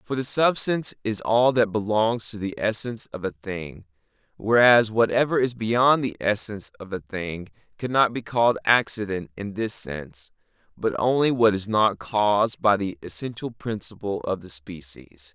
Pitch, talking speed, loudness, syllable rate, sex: 105 Hz, 165 wpm, -23 LUFS, 4.7 syllables/s, male